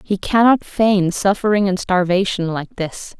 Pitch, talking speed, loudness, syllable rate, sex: 195 Hz, 150 wpm, -17 LUFS, 4.2 syllables/s, female